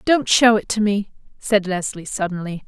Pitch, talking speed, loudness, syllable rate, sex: 200 Hz, 180 wpm, -19 LUFS, 4.8 syllables/s, female